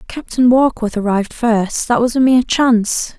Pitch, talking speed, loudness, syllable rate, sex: 235 Hz, 170 wpm, -15 LUFS, 5.0 syllables/s, female